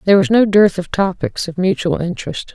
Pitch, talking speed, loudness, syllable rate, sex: 185 Hz, 210 wpm, -16 LUFS, 5.8 syllables/s, female